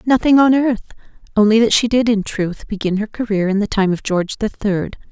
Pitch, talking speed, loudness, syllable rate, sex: 215 Hz, 210 wpm, -17 LUFS, 5.6 syllables/s, female